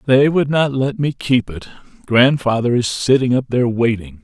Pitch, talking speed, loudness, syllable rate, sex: 125 Hz, 185 wpm, -16 LUFS, 4.9 syllables/s, male